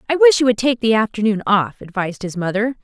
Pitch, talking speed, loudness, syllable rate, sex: 220 Hz, 235 wpm, -17 LUFS, 6.2 syllables/s, female